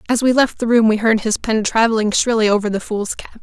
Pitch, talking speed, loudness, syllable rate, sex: 220 Hz, 245 wpm, -16 LUFS, 5.9 syllables/s, female